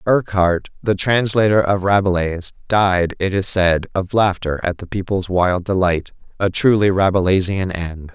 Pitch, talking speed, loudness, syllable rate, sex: 95 Hz, 140 wpm, -17 LUFS, 4.6 syllables/s, male